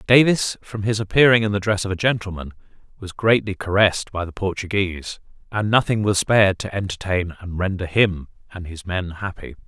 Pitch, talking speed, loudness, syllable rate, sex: 100 Hz, 180 wpm, -20 LUFS, 5.6 syllables/s, male